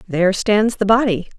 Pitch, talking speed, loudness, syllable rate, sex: 205 Hz, 175 wpm, -16 LUFS, 5.2 syllables/s, female